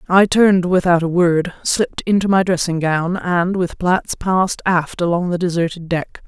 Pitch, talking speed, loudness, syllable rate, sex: 175 Hz, 180 wpm, -17 LUFS, 4.7 syllables/s, female